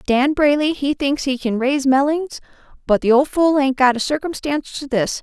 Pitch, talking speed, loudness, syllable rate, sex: 275 Hz, 205 wpm, -18 LUFS, 5.2 syllables/s, female